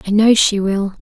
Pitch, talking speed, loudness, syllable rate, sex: 205 Hz, 235 wpm, -14 LUFS, 5.0 syllables/s, female